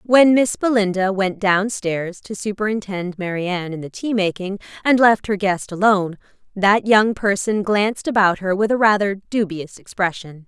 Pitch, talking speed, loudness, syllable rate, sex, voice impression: 200 Hz, 170 wpm, -19 LUFS, 4.8 syllables/s, female, very feminine, slightly middle-aged, slightly thin, very tensed, powerful, bright, slightly hard, clear, fluent, cool, intellectual, very refreshing, slightly sincere, calm, friendly, very reassuring, slightly unique, slightly elegant, slightly wild, sweet, lively, slightly strict, slightly intense, slightly sharp